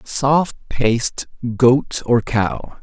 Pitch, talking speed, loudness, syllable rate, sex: 125 Hz, 105 wpm, -18 LUFS, 2.6 syllables/s, male